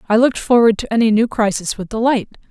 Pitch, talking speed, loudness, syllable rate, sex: 225 Hz, 215 wpm, -16 LUFS, 6.3 syllables/s, female